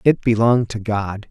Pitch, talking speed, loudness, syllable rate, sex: 110 Hz, 185 wpm, -18 LUFS, 5.0 syllables/s, male